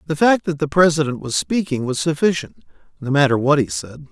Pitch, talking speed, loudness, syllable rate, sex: 150 Hz, 205 wpm, -18 LUFS, 5.6 syllables/s, male